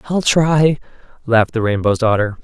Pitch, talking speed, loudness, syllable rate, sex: 125 Hz, 150 wpm, -15 LUFS, 5.2 syllables/s, male